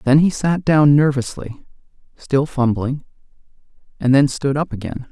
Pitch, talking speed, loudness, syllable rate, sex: 140 Hz, 140 wpm, -17 LUFS, 4.4 syllables/s, male